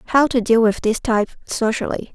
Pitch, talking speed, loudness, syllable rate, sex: 230 Hz, 195 wpm, -19 LUFS, 5.1 syllables/s, female